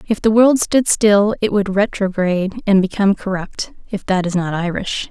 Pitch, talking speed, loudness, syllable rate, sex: 200 Hz, 190 wpm, -16 LUFS, 4.9 syllables/s, female